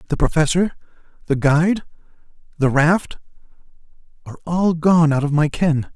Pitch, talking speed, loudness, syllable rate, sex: 160 Hz, 120 wpm, -18 LUFS, 5.1 syllables/s, male